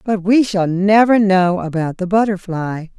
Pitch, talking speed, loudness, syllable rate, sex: 190 Hz, 160 wpm, -15 LUFS, 4.2 syllables/s, female